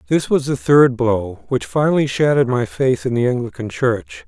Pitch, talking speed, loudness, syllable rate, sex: 130 Hz, 195 wpm, -17 LUFS, 5.0 syllables/s, male